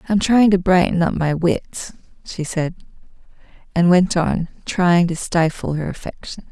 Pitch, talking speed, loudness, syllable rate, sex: 175 Hz, 155 wpm, -18 LUFS, 4.3 syllables/s, female